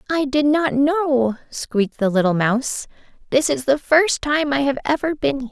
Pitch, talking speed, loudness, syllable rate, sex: 275 Hz, 195 wpm, -19 LUFS, 5.0 syllables/s, female